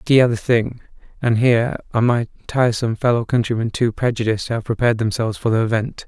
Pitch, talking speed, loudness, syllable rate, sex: 115 Hz, 195 wpm, -19 LUFS, 7.0 syllables/s, male